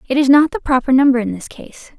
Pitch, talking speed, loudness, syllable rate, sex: 270 Hz, 270 wpm, -14 LUFS, 6.5 syllables/s, female